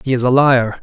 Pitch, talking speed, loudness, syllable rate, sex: 125 Hz, 290 wpm, -13 LUFS, 5.5 syllables/s, male